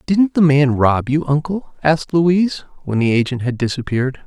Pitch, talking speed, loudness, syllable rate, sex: 145 Hz, 185 wpm, -17 LUFS, 5.3 syllables/s, male